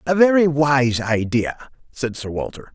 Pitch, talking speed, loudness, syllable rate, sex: 140 Hz, 155 wpm, -19 LUFS, 4.1 syllables/s, male